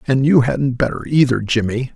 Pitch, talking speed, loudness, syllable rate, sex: 130 Hz, 185 wpm, -17 LUFS, 5.0 syllables/s, male